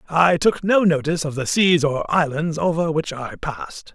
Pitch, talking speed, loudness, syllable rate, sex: 160 Hz, 200 wpm, -20 LUFS, 4.8 syllables/s, male